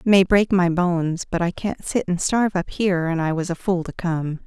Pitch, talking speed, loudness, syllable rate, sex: 180 Hz, 255 wpm, -21 LUFS, 5.2 syllables/s, female